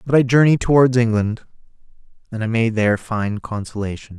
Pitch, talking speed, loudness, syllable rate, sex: 115 Hz, 160 wpm, -18 LUFS, 5.6 syllables/s, male